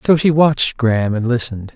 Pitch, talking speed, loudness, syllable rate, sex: 125 Hz, 205 wpm, -16 LUFS, 6.2 syllables/s, male